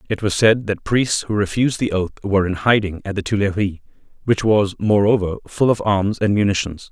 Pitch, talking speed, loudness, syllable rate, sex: 100 Hz, 200 wpm, -18 LUFS, 5.6 syllables/s, male